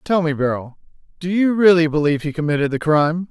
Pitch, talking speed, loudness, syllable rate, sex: 160 Hz, 200 wpm, -18 LUFS, 6.5 syllables/s, male